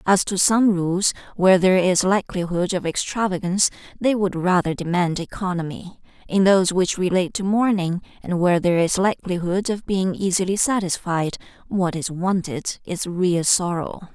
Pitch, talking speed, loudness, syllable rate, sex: 185 Hz, 155 wpm, -21 LUFS, 5.2 syllables/s, female